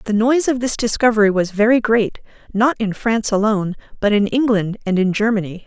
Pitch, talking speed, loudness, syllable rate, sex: 215 Hz, 190 wpm, -17 LUFS, 5.9 syllables/s, female